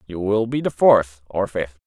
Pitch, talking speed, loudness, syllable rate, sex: 100 Hz, 225 wpm, -20 LUFS, 4.4 syllables/s, male